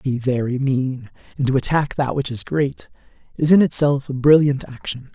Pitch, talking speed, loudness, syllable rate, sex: 135 Hz, 200 wpm, -19 LUFS, 5.0 syllables/s, male